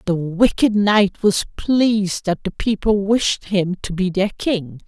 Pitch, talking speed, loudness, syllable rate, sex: 195 Hz, 170 wpm, -18 LUFS, 3.8 syllables/s, female